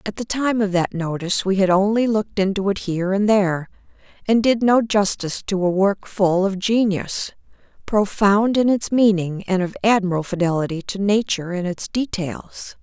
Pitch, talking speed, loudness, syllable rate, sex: 200 Hz, 180 wpm, -20 LUFS, 5.1 syllables/s, female